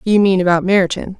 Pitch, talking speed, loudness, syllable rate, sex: 185 Hz, 200 wpm, -14 LUFS, 5.5 syllables/s, female